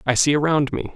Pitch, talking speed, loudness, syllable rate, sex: 145 Hz, 250 wpm, -19 LUFS, 6.0 syllables/s, male